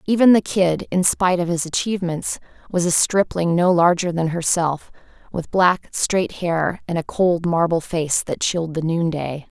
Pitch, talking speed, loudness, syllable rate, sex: 175 Hz, 175 wpm, -19 LUFS, 4.6 syllables/s, female